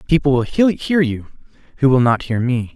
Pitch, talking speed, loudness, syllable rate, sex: 135 Hz, 195 wpm, -17 LUFS, 4.9 syllables/s, male